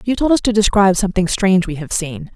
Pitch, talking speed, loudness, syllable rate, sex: 195 Hz, 255 wpm, -16 LUFS, 6.7 syllables/s, female